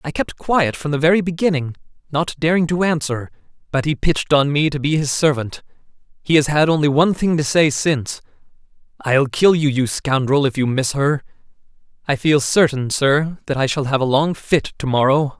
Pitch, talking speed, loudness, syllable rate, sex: 145 Hz, 200 wpm, -18 LUFS, 5.3 syllables/s, male